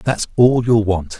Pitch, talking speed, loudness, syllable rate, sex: 110 Hz, 200 wpm, -15 LUFS, 3.8 syllables/s, male